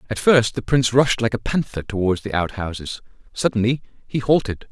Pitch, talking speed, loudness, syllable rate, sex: 115 Hz, 180 wpm, -20 LUFS, 5.6 syllables/s, male